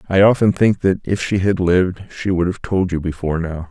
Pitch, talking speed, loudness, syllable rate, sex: 90 Hz, 245 wpm, -18 LUFS, 5.6 syllables/s, male